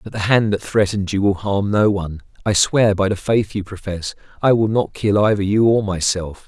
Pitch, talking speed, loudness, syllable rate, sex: 100 Hz, 230 wpm, -18 LUFS, 5.3 syllables/s, male